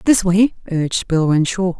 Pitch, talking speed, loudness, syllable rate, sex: 180 Hz, 165 wpm, -17 LUFS, 4.7 syllables/s, female